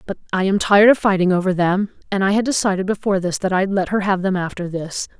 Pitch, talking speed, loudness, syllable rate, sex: 190 Hz, 255 wpm, -18 LUFS, 6.4 syllables/s, female